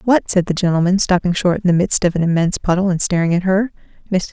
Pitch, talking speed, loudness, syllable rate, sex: 180 Hz, 250 wpm, -16 LUFS, 6.7 syllables/s, female